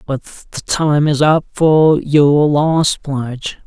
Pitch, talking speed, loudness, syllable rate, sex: 145 Hz, 145 wpm, -14 LUFS, 3.0 syllables/s, male